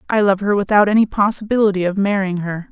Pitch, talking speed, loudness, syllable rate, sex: 200 Hz, 200 wpm, -16 LUFS, 6.3 syllables/s, female